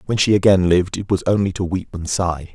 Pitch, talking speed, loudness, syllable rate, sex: 95 Hz, 260 wpm, -18 LUFS, 6.0 syllables/s, male